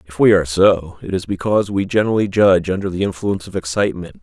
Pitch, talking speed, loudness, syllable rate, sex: 95 Hz, 215 wpm, -17 LUFS, 6.9 syllables/s, male